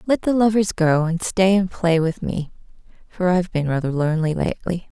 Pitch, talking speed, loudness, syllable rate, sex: 175 Hz, 195 wpm, -20 LUFS, 5.5 syllables/s, female